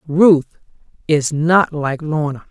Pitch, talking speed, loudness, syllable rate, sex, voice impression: 155 Hz, 120 wpm, -16 LUFS, 3.2 syllables/s, female, slightly feminine, adult-like, friendly, slightly unique